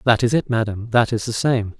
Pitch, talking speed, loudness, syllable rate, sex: 115 Hz, 270 wpm, -20 LUFS, 6.1 syllables/s, male